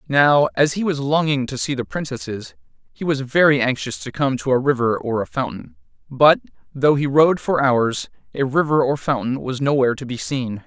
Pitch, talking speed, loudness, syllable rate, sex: 135 Hz, 205 wpm, -19 LUFS, 5.1 syllables/s, male